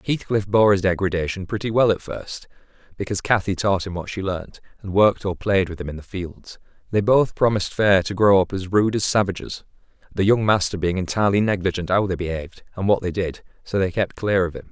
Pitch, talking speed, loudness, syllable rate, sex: 95 Hz, 220 wpm, -21 LUFS, 5.9 syllables/s, male